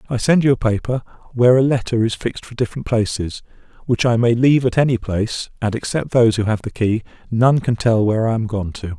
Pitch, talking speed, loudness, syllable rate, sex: 115 Hz, 235 wpm, -18 LUFS, 6.2 syllables/s, male